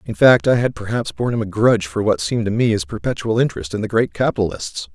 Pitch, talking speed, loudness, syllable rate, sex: 105 Hz, 255 wpm, -18 LUFS, 6.7 syllables/s, male